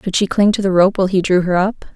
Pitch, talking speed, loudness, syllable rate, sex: 190 Hz, 340 wpm, -15 LUFS, 6.5 syllables/s, female